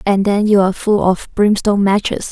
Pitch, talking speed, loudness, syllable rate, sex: 200 Hz, 180 wpm, -14 LUFS, 5.2 syllables/s, female